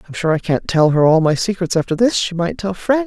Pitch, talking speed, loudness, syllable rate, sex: 180 Hz, 295 wpm, -16 LUFS, 5.8 syllables/s, female